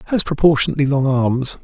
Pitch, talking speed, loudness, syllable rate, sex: 140 Hz, 145 wpm, -16 LUFS, 6.5 syllables/s, male